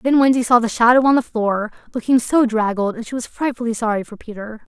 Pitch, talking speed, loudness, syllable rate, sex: 235 Hz, 225 wpm, -18 LUFS, 5.9 syllables/s, female